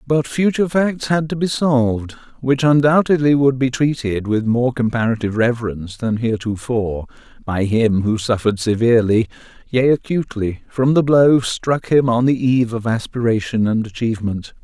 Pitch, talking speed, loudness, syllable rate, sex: 125 Hz, 145 wpm, -17 LUFS, 5.2 syllables/s, male